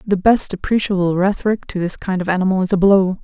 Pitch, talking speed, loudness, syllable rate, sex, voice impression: 190 Hz, 220 wpm, -17 LUFS, 6.2 syllables/s, female, feminine, adult-like, fluent, slightly sincere, calm